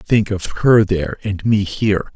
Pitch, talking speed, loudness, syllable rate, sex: 100 Hz, 195 wpm, -17 LUFS, 4.4 syllables/s, male